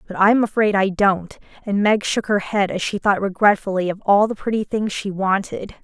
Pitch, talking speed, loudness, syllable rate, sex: 200 Hz, 225 wpm, -19 LUFS, 5.2 syllables/s, female